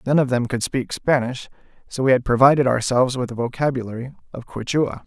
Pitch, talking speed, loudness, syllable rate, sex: 125 Hz, 190 wpm, -20 LUFS, 6.0 syllables/s, male